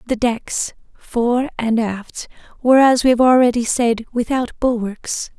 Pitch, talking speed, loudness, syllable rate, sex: 240 Hz, 145 wpm, -17 LUFS, 4.1 syllables/s, female